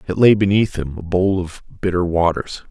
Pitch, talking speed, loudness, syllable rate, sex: 90 Hz, 200 wpm, -18 LUFS, 5.2 syllables/s, male